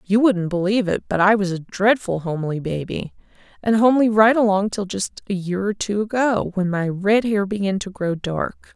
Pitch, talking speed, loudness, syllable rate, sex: 200 Hz, 205 wpm, -20 LUFS, 5.1 syllables/s, female